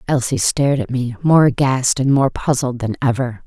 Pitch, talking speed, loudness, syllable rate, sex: 130 Hz, 190 wpm, -17 LUFS, 5.0 syllables/s, female